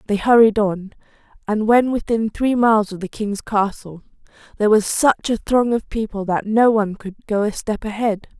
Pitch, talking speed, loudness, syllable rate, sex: 215 Hz, 195 wpm, -18 LUFS, 5.0 syllables/s, female